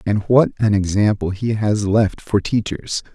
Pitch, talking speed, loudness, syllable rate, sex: 105 Hz, 170 wpm, -18 LUFS, 4.2 syllables/s, male